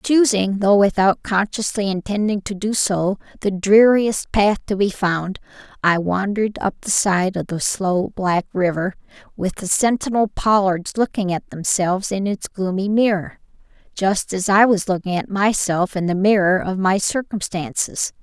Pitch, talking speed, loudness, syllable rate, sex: 195 Hz, 160 wpm, -19 LUFS, 4.4 syllables/s, female